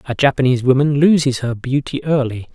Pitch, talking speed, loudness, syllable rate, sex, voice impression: 135 Hz, 165 wpm, -16 LUFS, 6.0 syllables/s, male, masculine, adult-like, tensed, slightly weak, hard, slightly raspy, intellectual, calm, friendly, reassuring, kind, slightly modest